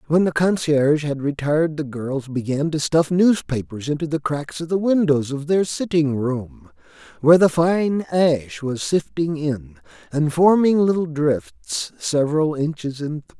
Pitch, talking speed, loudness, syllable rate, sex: 150 Hz, 160 wpm, -20 LUFS, 4.4 syllables/s, male